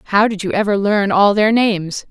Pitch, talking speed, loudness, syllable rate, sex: 205 Hz, 230 wpm, -15 LUFS, 5.4 syllables/s, female